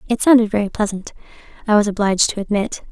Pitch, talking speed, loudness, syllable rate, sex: 210 Hz, 185 wpm, -17 LUFS, 7.1 syllables/s, female